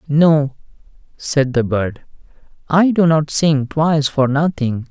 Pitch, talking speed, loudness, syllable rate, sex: 145 Hz, 135 wpm, -16 LUFS, 3.7 syllables/s, male